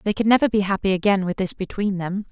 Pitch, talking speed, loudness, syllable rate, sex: 195 Hz, 260 wpm, -21 LUFS, 6.5 syllables/s, female